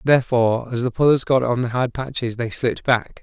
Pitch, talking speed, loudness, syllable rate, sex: 125 Hz, 225 wpm, -20 LUFS, 5.8 syllables/s, male